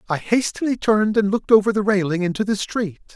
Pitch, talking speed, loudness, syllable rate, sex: 205 Hz, 210 wpm, -20 LUFS, 6.3 syllables/s, male